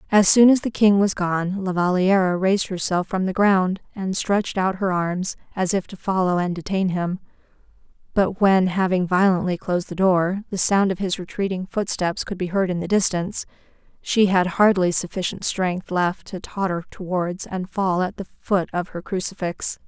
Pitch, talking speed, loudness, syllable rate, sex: 185 Hz, 185 wpm, -21 LUFS, 4.9 syllables/s, female